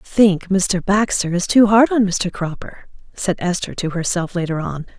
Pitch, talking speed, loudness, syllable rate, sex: 190 Hz, 195 wpm, -18 LUFS, 4.7 syllables/s, female